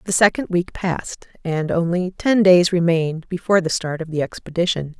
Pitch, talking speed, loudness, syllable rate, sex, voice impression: 175 Hz, 180 wpm, -19 LUFS, 5.4 syllables/s, female, feminine, adult-like, slightly soft, slightly sincere, calm, friendly, kind